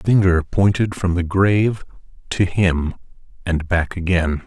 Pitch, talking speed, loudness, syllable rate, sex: 90 Hz, 150 wpm, -19 LUFS, 4.4 syllables/s, male